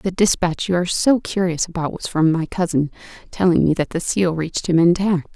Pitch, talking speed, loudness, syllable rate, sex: 175 Hz, 215 wpm, -19 LUFS, 5.5 syllables/s, female